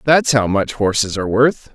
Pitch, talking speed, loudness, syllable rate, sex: 120 Hz, 205 wpm, -16 LUFS, 5.0 syllables/s, male